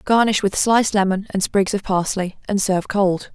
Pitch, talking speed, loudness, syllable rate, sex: 200 Hz, 195 wpm, -19 LUFS, 5.1 syllables/s, female